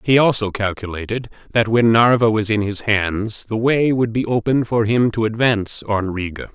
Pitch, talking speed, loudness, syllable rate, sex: 110 Hz, 195 wpm, -18 LUFS, 4.9 syllables/s, male